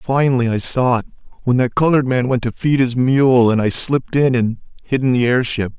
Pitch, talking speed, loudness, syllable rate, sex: 125 Hz, 230 wpm, -16 LUFS, 5.5 syllables/s, male